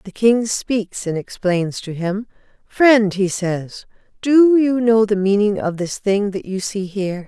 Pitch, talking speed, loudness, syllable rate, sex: 205 Hz, 180 wpm, -18 LUFS, 3.9 syllables/s, female